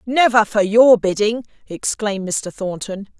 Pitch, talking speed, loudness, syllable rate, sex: 215 Hz, 130 wpm, -17 LUFS, 4.3 syllables/s, female